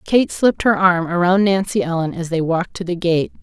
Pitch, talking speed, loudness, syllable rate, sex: 180 Hz, 230 wpm, -17 LUFS, 5.6 syllables/s, female